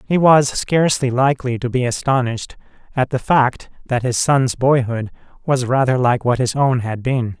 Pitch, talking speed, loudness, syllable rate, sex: 130 Hz, 180 wpm, -17 LUFS, 4.8 syllables/s, male